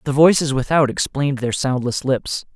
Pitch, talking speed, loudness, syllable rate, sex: 135 Hz, 165 wpm, -18 LUFS, 5.1 syllables/s, male